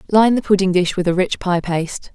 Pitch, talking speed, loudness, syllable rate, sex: 190 Hz, 250 wpm, -17 LUFS, 5.6 syllables/s, female